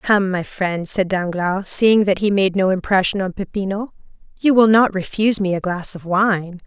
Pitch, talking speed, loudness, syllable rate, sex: 195 Hz, 200 wpm, -18 LUFS, 4.7 syllables/s, female